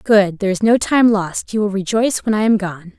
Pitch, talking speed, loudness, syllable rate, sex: 205 Hz, 240 wpm, -16 LUFS, 5.6 syllables/s, female